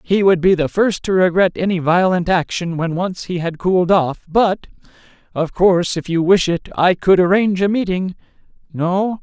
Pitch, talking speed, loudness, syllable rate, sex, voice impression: 180 Hz, 190 wpm, -16 LUFS, 5.0 syllables/s, male, very masculine, adult-like, middle-aged, slightly thick, tensed, powerful, very bright, slightly soft, very clear, fluent, cool, very intellectual, very refreshing, slightly sincere, slightly calm, slightly mature, friendly, very reassuring, very unique, very elegant, sweet, very lively, kind, intense, very light